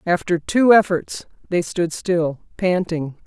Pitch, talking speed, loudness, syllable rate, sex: 175 Hz, 130 wpm, -19 LUFS, 3.7 syllables/s, female